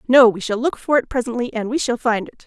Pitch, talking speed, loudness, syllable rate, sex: 240 Hz, 290 wpm, -19 LUFS, 6.1 syllables/s, female